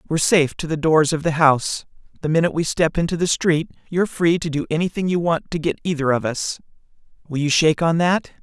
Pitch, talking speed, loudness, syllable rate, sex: 160 Hz, 230 wpm, -20 LUFS, 6.3 syllables/s, male